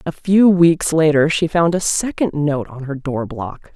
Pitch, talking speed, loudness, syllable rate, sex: 155 Hz, 210 wpm, -16 LUFS, 4.2 syllables/s, female